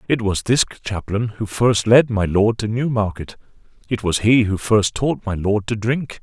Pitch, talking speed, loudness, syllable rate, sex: 110 Hz, 200 wpm, -19 LUFS, 4.5 syllables/s, male